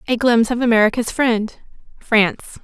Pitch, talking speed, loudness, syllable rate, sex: 230 Hz, 115 wpm, -17 LUFS, 5.9 syllables/s, female